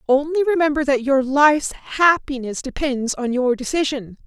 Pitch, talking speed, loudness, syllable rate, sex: 280 Hz, 140 wpm, -19 LUFS, 4.7 syllables/s, female